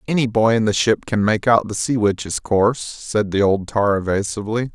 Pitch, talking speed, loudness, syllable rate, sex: 105 Hz, 215 wpm, -19 LUFS, 5.1 syllables/s, male